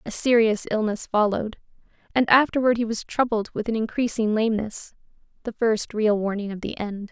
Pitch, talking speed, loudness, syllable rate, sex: 220 Hz, 160 wpm, -23 LUFS, 5.4 syllables/s, female